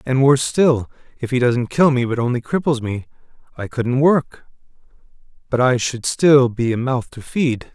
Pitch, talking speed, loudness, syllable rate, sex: 130 Hz, 185 wpm, -18 LUFS, 4.7 syllables/s, male